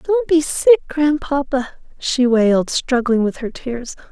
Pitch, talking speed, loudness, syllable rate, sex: 270 Hz, 145 wpm, -17 LUFS, 4.0 syllables/s, female